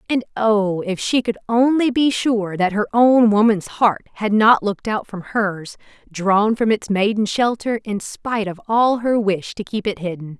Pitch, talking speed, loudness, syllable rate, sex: 215 Hz, 195 wpm, -18 LUFS, 4.4 syllables/s, female